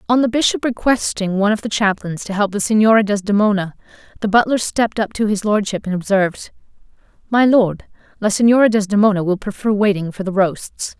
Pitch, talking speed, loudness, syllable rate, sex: 205 Hz, 180 wpm, -17 LUFS, 5.9 syllables/s, female